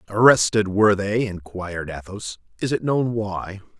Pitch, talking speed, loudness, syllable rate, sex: 100 Hz, 140 wpm, -21 LUFS, 4.6 syllables/s, male